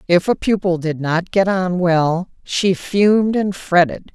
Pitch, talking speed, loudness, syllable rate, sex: 180 Hz, 175 wpm, -17 LUFS, 3.9 syllables/s, female